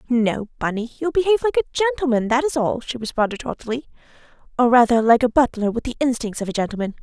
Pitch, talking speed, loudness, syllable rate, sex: 255 Hz, 205 wpm, -20 LUFS, 6.9 syllables/s, female